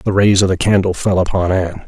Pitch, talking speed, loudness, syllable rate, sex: 95 Hz, 255 wpm, -15 LUFS, 6.0 syllables/s, male